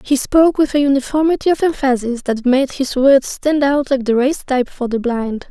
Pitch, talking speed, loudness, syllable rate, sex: 270 Hz, 220 wpm, -16 LUFS, 5.4 syllables/s, female